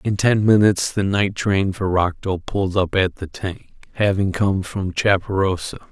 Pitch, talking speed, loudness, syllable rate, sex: 100 Hz, 170 wpm, -20 LUFS, 4.5 syllables/s, male